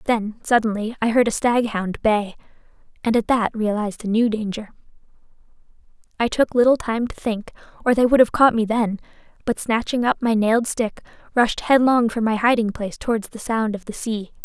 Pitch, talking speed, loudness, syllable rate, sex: 225 Hz, 185 wpm, -20 LUFS, 5.4 syllables/s, female